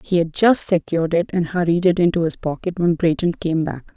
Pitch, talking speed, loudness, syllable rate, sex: 170 Hz, 225 wpm, -19 LUFS, 5.5 syllables/s, female